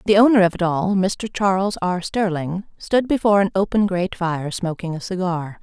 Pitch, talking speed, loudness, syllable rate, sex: 185 Hz, 190 wpm, -20 LUFS, 5.1 syllables/s, female